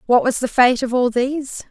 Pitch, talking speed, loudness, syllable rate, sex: 255 Hz, 245 wpm, -18 LUFS, 5.3 syllables/s, female